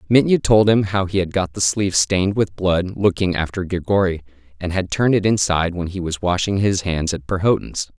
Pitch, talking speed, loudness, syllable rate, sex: 95 Hz, 210 wpm, -19 LUFS, 5.6 syllables/s, male